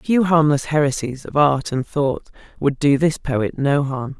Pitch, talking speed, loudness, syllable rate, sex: 145 Hz, 200 wpm, -19 LUFS, 4.5 syllables/s, female